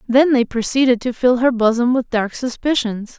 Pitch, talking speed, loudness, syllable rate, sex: 245 Hz, 190 wpm, -17 LUFS, 5.0 syllables/s, female